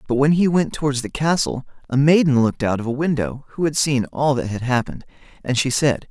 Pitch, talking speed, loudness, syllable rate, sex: 135 Hz, 235 wpm, -19 LUFS, 6.0 syllables/s, male